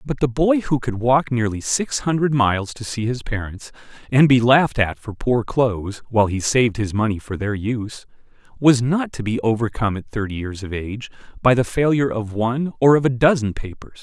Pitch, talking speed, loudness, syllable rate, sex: 120 Hz, 210 wpm, -20 LUFS, 5.5 syllables/s, male